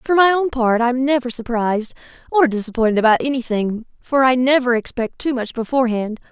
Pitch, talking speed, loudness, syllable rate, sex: 245 Hz, 180 wpm, -18 LUFS, 5.9 syllables/s, female